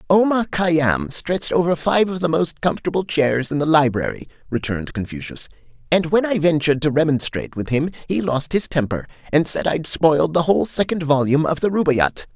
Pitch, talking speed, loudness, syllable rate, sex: 155 Hz, 185 wpm, -19 LUFS, 5.6 syllables/s, male